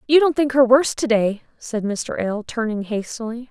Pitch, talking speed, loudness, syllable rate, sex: 235 Hz, 205 wpm, -20 LUFS, 5.0 syllables/s, female